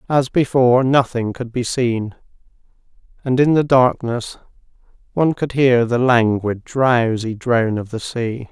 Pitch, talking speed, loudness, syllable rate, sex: 125 Hz, 140 wpm, -17 LUFS, 4.3 syllables/s, male